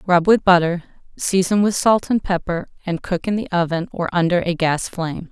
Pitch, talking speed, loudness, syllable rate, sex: 180 Hz, 205 wpm, -19 LUFS, 5.3 syllables/s, female